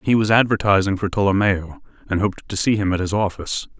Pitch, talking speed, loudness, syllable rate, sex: 100 Hz, 205 wpm, -19 LUFS, 6.3 syllables/s, male